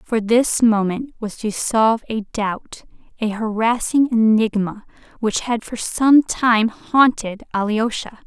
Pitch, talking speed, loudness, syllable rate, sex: 225 Hz, 130 wpm, -19 LUFS, 3.7 syllables/s, female